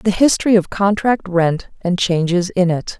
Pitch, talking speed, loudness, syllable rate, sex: 190 Hz, 180 wpm, -16 LUFS, 4.6 syllables/s, female